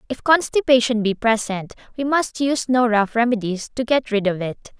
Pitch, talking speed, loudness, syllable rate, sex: 235 Hz, 190 wpm, -20 LUFS, 5.1 syllables/s, female